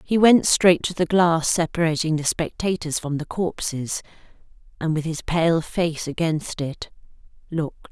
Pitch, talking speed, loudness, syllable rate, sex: 165 Hz, 150 wpm, -22 LUFS, 4.4 syllables/s, female